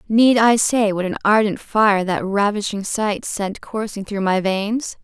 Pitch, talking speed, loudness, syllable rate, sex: 205 Hz, 180 wpm, -19 LUFS, 4.0 syllables/s, female